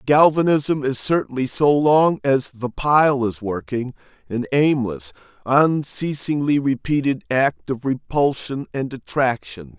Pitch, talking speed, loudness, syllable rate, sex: 135 Hz, 115 wpm, -20 LUFS, 3.9 syllables/s, male